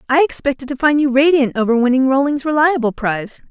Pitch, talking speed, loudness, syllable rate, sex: 270 Hz, 190 wpm, -15 LUFS, 6.1 syllables/s, female